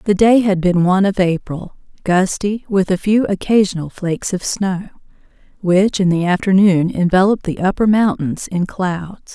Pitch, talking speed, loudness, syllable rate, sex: 190 Hz, 160 wpm, -16 LUFS, 4.8 syllables/s, female